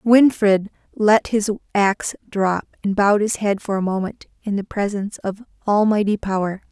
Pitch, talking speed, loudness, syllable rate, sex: 205 Hz, 160 wpm, -20 LUFS, 5.0 syllables/s, female